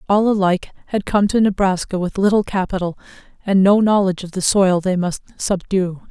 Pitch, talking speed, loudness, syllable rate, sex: 190 Hz, 175 wpm, -18 LUFS, 5.6 syllables/s, female